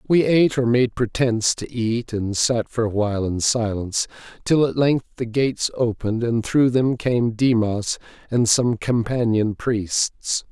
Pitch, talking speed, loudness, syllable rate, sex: 120 Hz, 165 wpm, -21 LUFS, 4.3 syllables/s, male